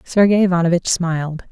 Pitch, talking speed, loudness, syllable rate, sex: 175 Hz, 120 wpm, -16 LUFS, 5.7 syllables/s, female